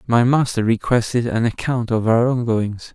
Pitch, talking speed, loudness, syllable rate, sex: 115 Hz, 165 wpm, -19 LUFS, 4.7 syllables/s, male